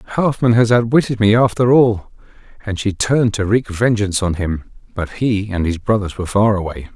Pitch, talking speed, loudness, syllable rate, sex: 105 Hz, 190 wpm, -16 LUFS, 5.4 syllables/s, male